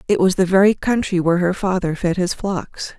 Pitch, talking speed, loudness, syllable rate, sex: 185 Hz, 220 wpm, -18 LUFS, 5.4 syllables/s, female